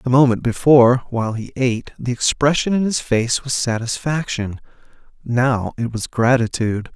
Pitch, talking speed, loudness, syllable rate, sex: 125 Hz, 145 wpm, -18 LUFS, 4.9 syllables/s, male